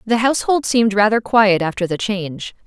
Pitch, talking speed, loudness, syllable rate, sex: 210 Hz, 180 wpm, -16 LUFS, 5.7 syllables/s, female